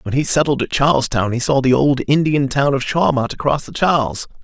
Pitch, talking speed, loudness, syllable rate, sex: 135 Hz, 215 wpm, -17 LUFS, 5.5 syllables/s, male